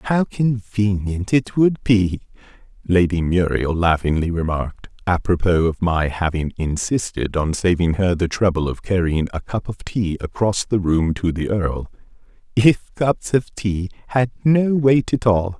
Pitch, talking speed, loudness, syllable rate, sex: 95 Hz, 160 wpm, -20 LUFS, 4.2 syllables/s, male